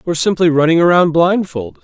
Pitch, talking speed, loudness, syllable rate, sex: 165 Hz, 165 wpm, -13 LUFS, 6.5 syllables/s, male